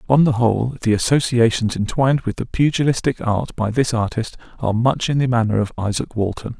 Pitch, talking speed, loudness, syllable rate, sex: 120 Hz, 190 wpm, -19 LUFS, 5.8 syllables/s, male